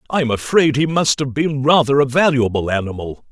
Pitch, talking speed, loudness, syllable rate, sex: 135 Hz, 180 wpm, -16 LUFS, 5.2 syllables/s, male